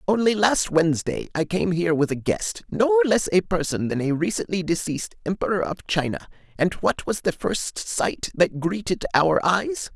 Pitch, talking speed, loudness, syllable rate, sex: 165 Hz, 170 wpm, -23 LUFS, 4.8 syllables/s, male